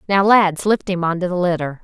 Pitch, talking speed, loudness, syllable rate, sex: 180 Hz, 260 wpm, -17 LUFS, 5.5 syllables/s, female